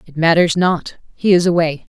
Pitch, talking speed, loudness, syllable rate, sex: 170 Hz, 150 wpm, -15 LUFS, 5.1 syllables/s, female